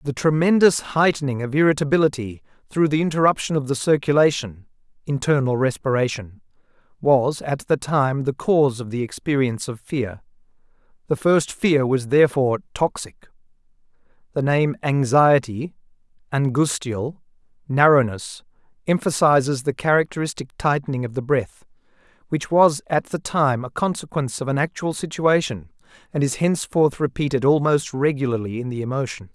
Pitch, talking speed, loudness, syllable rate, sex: 140 Hz, 125 wpm, -21 LUFS, 5.0 syllables/s, male